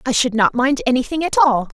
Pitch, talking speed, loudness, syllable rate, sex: 245 Hz, 235 wpm, -17 LUFS, 5.8 syllables/s, female